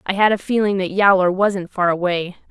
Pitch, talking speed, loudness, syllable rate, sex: 190 Hz, 215 wpm, -18 LUFS, 5.3 syllables/s, female